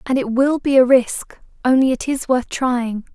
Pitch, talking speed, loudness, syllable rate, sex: 260 Hz, 210 wpm, -17 LUFS, 4.4 syllables/s, female